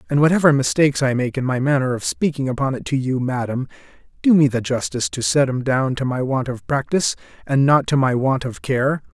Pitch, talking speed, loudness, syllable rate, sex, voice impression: 135 Hz, 230 wpm, -19 LUFS, 5.9 syllables/s, male, very masculine, old, very thick, slightly tensed, slightly powerful, bright, slightly hard, slightly muffled, fluent, slightly raspy, cool, intellectual, very sincere, very calm, very mature, very friendly, reassuring, unique, slightly elegant, wild, lively, kind, slightly intense